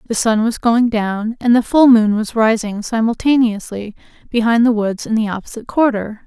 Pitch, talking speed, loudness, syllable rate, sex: 225 Hz, 180 wpm, -15 LUFS, 5.1 syllables/s, female